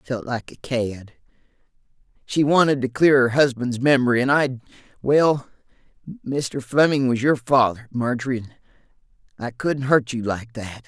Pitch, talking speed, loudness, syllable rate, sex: 130 Hz, 145 wpm, -21 LUFS, 4.6 syllables/s, male